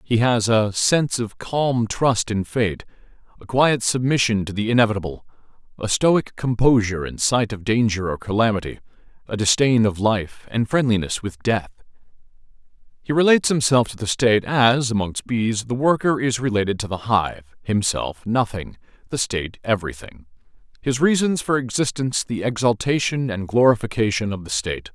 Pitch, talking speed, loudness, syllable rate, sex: 115 Hz, 155 wpm, -20 LUFS, 5.2 syllables/s, male